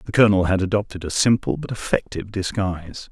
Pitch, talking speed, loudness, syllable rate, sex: 100 Hz, 175 wpm, -21 LUFS, 6.4 syllables/s, male